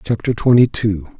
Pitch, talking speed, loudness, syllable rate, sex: 110 Hz, 150 wpm, -15 LUFS, 5.0 syllables/s, male